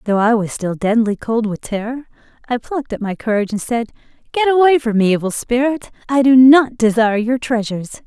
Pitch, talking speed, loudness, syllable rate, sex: 235 Hz, 200 wpm, -16 LUFS, 5.8 syllables/s, female